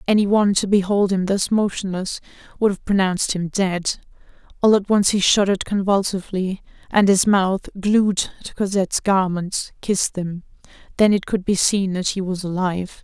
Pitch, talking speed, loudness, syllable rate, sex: 195 Hz, 165 wpm, -20 LUFS, 5.2 syllables/s, female